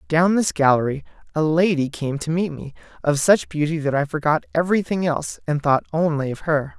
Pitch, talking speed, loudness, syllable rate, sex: 155 Hz, 195 wpm, -21 LUFS, 5.5 syllables/s, male